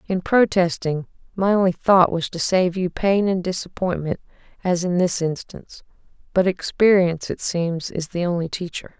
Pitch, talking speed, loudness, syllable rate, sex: 180 Hz, 145 wpm, -21 LUFS, 4.8 syllables/s, female